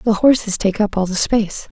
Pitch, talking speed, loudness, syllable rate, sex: 210 Hz, 235 wpm, -17 LUFS, 5.7 syllables/s, female